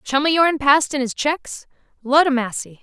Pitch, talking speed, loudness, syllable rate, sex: 280 Hz, 170 wpm, -18 LUFS, 5.1 syllables/s, female